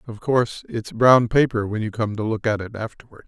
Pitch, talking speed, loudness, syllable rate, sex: 110 Hz, 240 wpm, -21 LUFS, 5.6 syllables/s, male